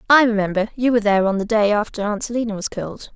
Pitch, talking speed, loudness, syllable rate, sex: 215 Hz, 245 wpm, -19 LUFS, 7.3 syllables/s, female